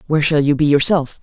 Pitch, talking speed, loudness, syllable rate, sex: 150 Hz, 245 wpm, -15 LUFS, 6.5 syllables/s, male